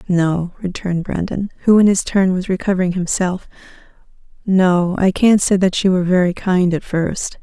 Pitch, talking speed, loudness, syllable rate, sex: 185 Hz, 170 wpm, -16 LUFS, 4.9 syllables/s, female